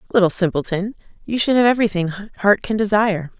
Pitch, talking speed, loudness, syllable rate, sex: 200 Hz, 160 wpm, -18 LUFS, 6.0 syllables/s, female